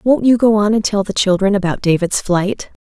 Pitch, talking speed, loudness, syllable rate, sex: 205 Hz, 235 wpm, -15 LUFS, 5.2 syllables/s, female